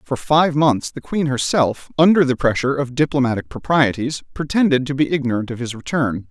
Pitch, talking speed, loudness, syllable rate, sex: 140 Hz, 180 wpm, -18 LUFS, 5.5 syllables/s, male